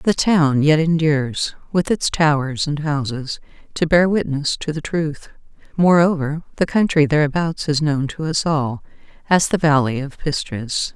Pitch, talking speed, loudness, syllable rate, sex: 150 Hz, 160 wpm, -19 LUFS, 4.4 syllables/s, female